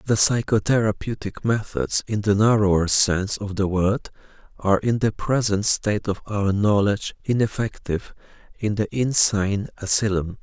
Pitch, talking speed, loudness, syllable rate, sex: 105 Hz, 130 wpm, -22 LUFS, 5.0 syllables/s, male